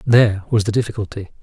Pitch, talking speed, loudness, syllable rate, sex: 105 Hz, 170 wpm, -18 LUFS, 6.8 syllables/s, male